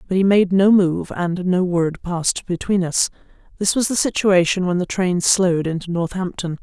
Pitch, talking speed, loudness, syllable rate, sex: 180 Hz, 190 wpm, -19 LUFS, 4.9 syllables/s, female